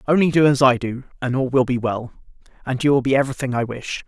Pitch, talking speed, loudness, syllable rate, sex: 130 Hz, 265 wpm, -20 LUFS, 6.5 syllables/s, male